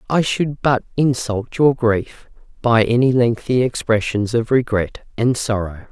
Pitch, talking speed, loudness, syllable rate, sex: 120 Hz, 140 wpm, -18 LUFS, 4.1 syllables/s, female